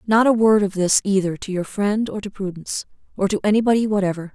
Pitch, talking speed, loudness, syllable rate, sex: 200 Hz, 220 wpm, -20 LUFS, 6.2 syllables/s, female